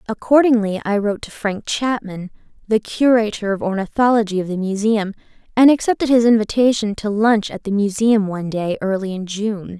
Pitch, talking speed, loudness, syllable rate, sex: 210 Hz, 165 wpm, -18 LUFS, 5.4 syllables/s, female